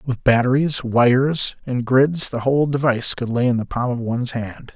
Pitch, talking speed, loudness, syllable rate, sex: 125 Hz, 200 wpm, -19 LUFS, 5.0 syllables/s, male